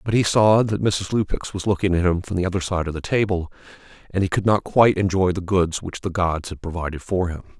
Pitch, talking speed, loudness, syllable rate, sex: 95 Hz, 255 wpm, -21 LUFS, 5.9 syllables/s, male